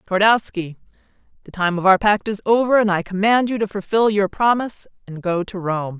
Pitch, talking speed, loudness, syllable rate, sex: 200 Hz, 200 wpm, -18 LUFS, 5.5 syllables/s, female